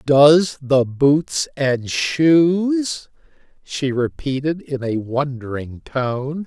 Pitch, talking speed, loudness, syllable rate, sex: 145 Hz, 100 wpm, -19 LUFS, 2.6 syllables/s, male